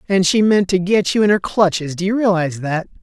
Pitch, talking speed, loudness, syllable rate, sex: 185 Hz, 260 wpm, -16 LUFS, 5.8 syllables/s, male